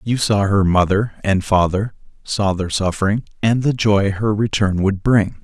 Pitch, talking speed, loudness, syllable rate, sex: 100 Hz, 175 wpm, -18 LUFS, 4.4 syllables/s, male